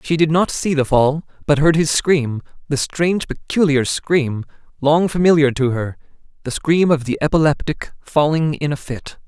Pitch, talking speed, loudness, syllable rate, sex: 150 Hz, 160 wpm, -17 LUFS, 4.7 syllables/s, male